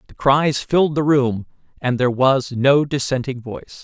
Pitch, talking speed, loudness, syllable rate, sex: 135 Hz, 170 wpm, -18 LUFS, 4.8 syllables/s, male